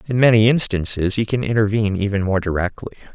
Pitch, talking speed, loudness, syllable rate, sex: 105 Hz, 170 wpm, -18 LUFS, 6.5 syllables/s, male